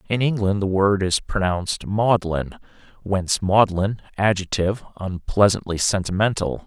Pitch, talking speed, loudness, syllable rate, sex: 100 Hz, 110 wpm, -21 LUFS, 4.7 syllables/s, male